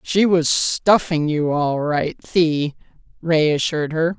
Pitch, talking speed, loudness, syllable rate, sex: 160 Hz, 145 wpm, -19 LUFS, 3.7 syllables/s, female